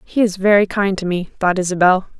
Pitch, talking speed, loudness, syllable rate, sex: 190 Hz, 220 wpm, -16 LUFS, 5.5 syllables/s, female